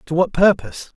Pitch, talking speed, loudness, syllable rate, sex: 170 Hz, 185 wpm, -17 LUFS, 5.9 syllables/s, male